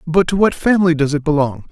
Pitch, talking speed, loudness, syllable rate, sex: 160 Hz, 245 wpm, -15 LUFS, 6.5 syllables/s, male